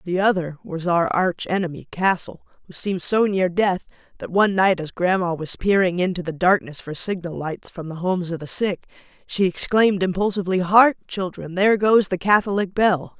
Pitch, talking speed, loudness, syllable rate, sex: 185 Hz, 185 wpm, -21 LUFS, 5.3 syllables/s, female